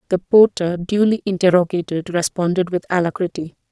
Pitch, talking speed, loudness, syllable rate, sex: 180 Hz, 115 wpm, -18 LUFS, 5.5 syllables/s, female